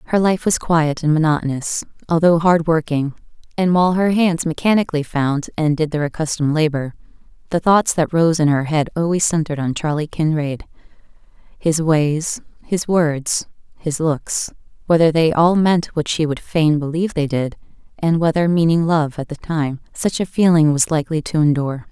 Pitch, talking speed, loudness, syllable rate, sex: 160 Hz, 170 wpm, -18 LUFS, 5.0 syllables/s, female